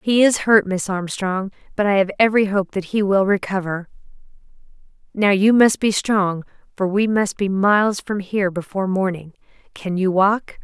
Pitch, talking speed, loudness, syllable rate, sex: 195 Hz, 175 wpm, -19 LUFS, 5.0 syllables/s, female